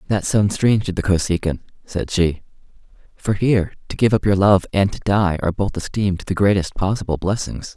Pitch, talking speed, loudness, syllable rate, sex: 95 Hz, 195 wpm, -19 LUFS, 5.7 syllables/s, male